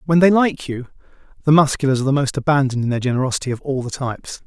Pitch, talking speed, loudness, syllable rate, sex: 140 Hz, 230 wpm, -18 LUFS, 7.5 syllables/s, male